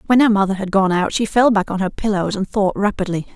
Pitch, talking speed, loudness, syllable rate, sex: 200 Hz, 270 wpm, -18 LUFS, 6.1 syllables/s, female